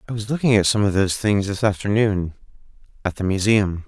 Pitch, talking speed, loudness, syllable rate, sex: 100 Hz, 200 wpm, -20 LUFS, 6.0 syllables/s, male